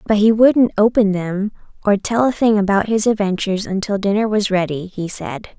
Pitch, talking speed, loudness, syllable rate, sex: 205 Hz, 195 wpm, -17 LUFS, 5.2 syllables/s, female